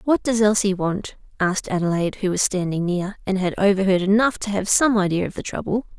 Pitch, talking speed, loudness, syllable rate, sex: 195 Hz, 210 wpm, -21 LUFS, 5.8 syllables/s, female